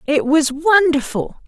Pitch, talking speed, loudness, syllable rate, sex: 305 Hz, 120 wpm, -16 LUFS, 3.8 syllables/s, female